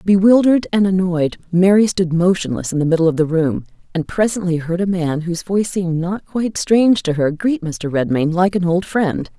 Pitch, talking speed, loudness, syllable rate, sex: 180 Hz, 205 wpm, -17 LUFS, 5.4 syllables/s, female